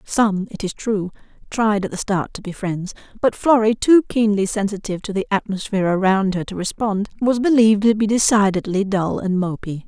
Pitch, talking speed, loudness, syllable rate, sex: 205 Hz, 190 wpm, -19 LUFS, 5.3 syllables/s, female